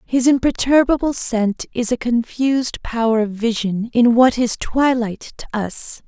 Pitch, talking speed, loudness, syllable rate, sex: 240 Hz, 150 wpm, -18 LUFS, 4.2 syllables/s, female